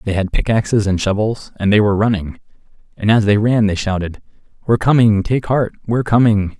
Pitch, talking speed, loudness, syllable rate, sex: 105 Hz, 190 wpm, -16 LUFS, 5.9 syllables/s, male